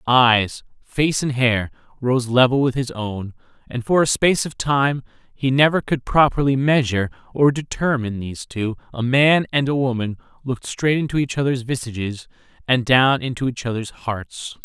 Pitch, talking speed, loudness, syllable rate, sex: 125 Hz, 170 wpm, -20 LUFS, 4.9 syllables/s, male